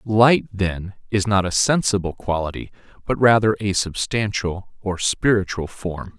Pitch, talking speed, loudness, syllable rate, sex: 100 Hz, 135 wpm, -20 LUFS, 4.2 syllables/s, male